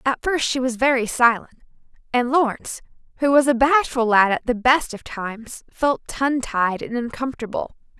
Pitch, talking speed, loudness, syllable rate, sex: 250 Hz, 175 wpm, -20 LUFS, 5.1 syllables/s, female